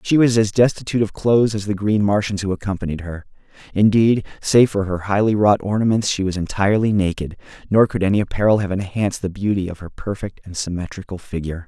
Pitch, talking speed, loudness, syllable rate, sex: 100 Hz, 195 wpm, -19 LUFS, 6.2 syllables/s, male